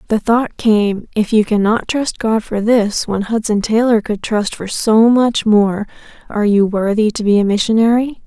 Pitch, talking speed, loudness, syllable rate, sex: 215 Hz, 180 wpm, -15 LUFS, 4.5 syllables/s, female